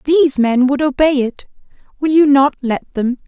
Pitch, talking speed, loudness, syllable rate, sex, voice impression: 275 Hz, 185 wpm, -14 LUFS, 4.7 syllables/s, female, very feminine, slightly middle-aged, very thin, very tensed, powerful, very bright, hard, very clear, very fluent, cool, slightly intellectual, very refreshing, slightly sincere, slightly calm, slightly friendly, slightly reassuring, very unique, elegant, wild, slightly sweet, very lively, strict, intense, sharp, light